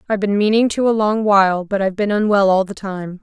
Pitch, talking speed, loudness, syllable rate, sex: 200 Hz, 260 wpm, -16 LUFS, 6.2 syllables/s, female